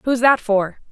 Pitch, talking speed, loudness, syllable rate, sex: 230 Hz, 195 wpm, -17 LUFS, 4.4 syllables/s, female